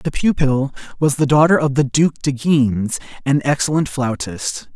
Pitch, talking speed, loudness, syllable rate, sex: 140 Hz, 165 wpm, -17 LUFS, 4.6 syllables/s, male